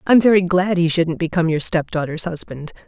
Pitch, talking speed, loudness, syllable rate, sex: 170 Hz, 190 wpm, -18 LUFS, 5.8 syllables/s, female